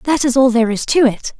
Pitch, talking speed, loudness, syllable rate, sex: 250 Hz, 300 wpm, -14 LUFS, 6.4 syllables/s, female